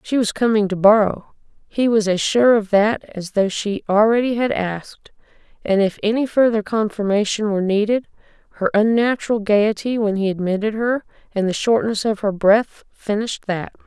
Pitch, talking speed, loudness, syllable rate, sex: 215 Hz, 165 wpm, -18 LUFS, 5.1 syllables/s, female